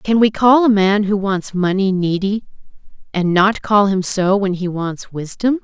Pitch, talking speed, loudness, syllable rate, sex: 200 Hz, 190 wpm, -16 LUFS, 4.3 syllables/s, female